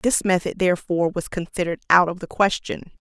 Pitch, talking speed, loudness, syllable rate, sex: 180 Hz, 175 wpm, -21 LUFS, 6.1 syllables/s, female